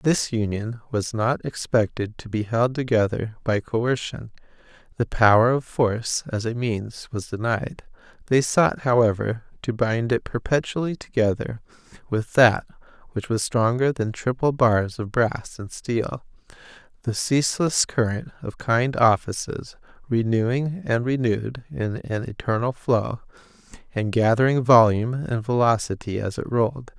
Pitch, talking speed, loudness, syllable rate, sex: 115 Hz, 135 wpm, -23 LUFS, 4.4 syllables/s, male